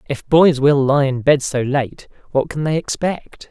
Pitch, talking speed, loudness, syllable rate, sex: 140 Hz, 205 wpm, -17 LUFS, 4.2 syllables/s, male